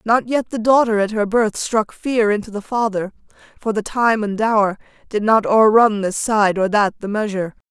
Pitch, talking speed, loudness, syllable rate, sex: 215 Hz, 200 wpm, -18 LUFS, 5.1 syllables/s, female